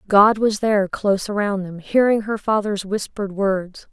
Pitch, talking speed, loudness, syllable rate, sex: 205 Hz, 170 wpm, -20 LUFS, 4.8 syllables/s, female